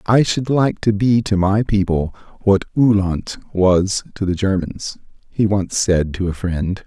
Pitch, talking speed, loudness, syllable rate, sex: 100 Hz, 175 wpm, -18 LUFS, 4.0 syllables/s, male